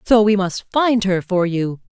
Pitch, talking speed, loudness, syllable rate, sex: 200 Hz, 220 wpm, -18 LUFS, 4.2 syllables/s, female